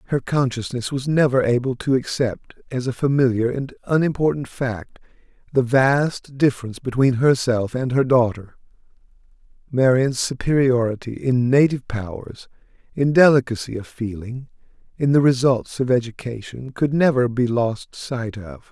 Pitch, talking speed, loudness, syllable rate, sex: 125 Hz, 130 wpm, -20 LUFS, 4.8 syllables/s, male